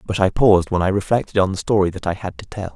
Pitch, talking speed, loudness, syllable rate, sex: 100 Hz, 305 wpm, -19 LUFS, 6.8 syllables/s, male